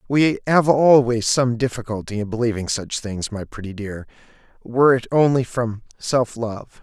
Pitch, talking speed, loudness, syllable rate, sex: 120 Hz, 160 wpm, -20 LUFS, 4.7 syllables/s, male